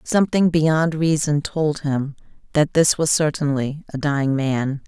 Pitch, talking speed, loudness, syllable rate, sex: 150 Hz, 150 wpm, -20 LUFS, 4.2 syllables/s, female